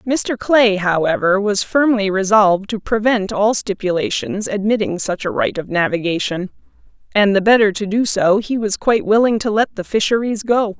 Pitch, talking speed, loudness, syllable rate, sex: 210 Hz, 170 wpm, -16 LUFS, 5.0 syllables/s, female